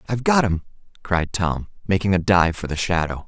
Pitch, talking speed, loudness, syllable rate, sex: 95 Hz, 200 wpm, -21 LUFS, 5.5 syllables/s, male